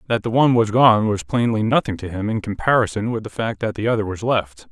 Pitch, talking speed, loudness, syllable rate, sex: 110 Hz, 255 wpm, -19 LUFS, 6.0 syllables/s, male